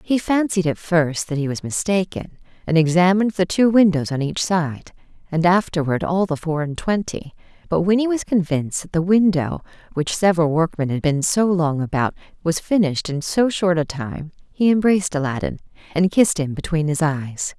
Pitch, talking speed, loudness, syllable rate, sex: 170 Hz, 190 wpm, -20 LUFS, 5.2 syllables/s, female